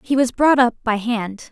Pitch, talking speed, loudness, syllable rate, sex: 240 Hz, 240 wpm, -18 LUFS, 4.5 syllables/s, female